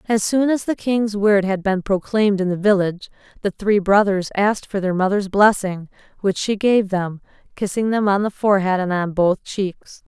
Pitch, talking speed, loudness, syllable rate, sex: 200 Hz, 195 wpm, -19 LUFS, 5.0 syllables/s, female